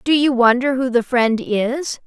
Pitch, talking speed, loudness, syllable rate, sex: 255 Hz, 205 wpm, -17 LUFS, 4.0 syllables/s, female